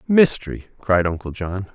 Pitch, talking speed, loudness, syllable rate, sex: 105 Hz, 135 wpm, -20 LUFS, 4.9 syllables/s, male